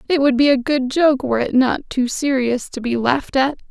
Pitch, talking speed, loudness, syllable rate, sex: 265 Hz, 245 wpm, -18 LUFS, 5.2 syllables/s, female